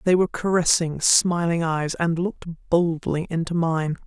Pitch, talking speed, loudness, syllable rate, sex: 165 Hz, 150 wpm, -22 LUFS, 4.7 syllables/s, female